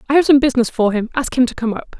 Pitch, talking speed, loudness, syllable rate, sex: 250 Hz, 330 wpm, -16 LUFS, 7.4 syllables/s, female